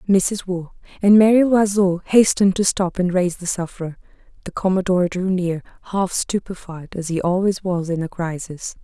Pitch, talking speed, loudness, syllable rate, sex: 185 Hz, 170 wpm, -19 LUFS, 5.3 syllables/s, female